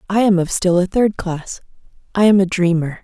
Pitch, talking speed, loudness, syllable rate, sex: 185 Hz, 200 wpm, -16 LUFS, 5.2 syllables/s, female